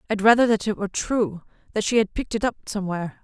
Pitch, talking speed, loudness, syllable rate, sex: 210 Hz, 220 wpm, -23 LUFS, 7.3 syllables/s, female